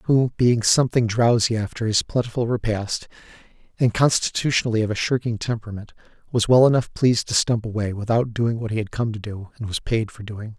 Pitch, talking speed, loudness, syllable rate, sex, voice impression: 115 Hz, 195 wpm, -21 LUFS, 5.7 syllables/s, male, very masculine, slightly old, very thick, slightly tensed, slightly powerful, bright, soft, clear, fluent, slightly raspy, cool, intellectual, slightly refreshing, sincere, calm, friendly, very reassuring, unique, slightly elegant, wild, slightly sweet, lively, kind, slightly modest